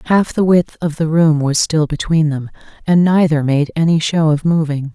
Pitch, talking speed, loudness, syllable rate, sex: 160 Hz, 205 wpm, -15 LUFS, 4.9 syllables/s, female